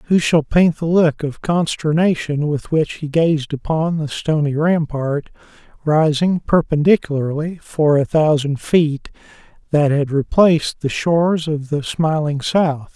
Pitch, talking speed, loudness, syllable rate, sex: 155 Hz, 130 wpm, -17 LUFS, 4.1 syllables/s, male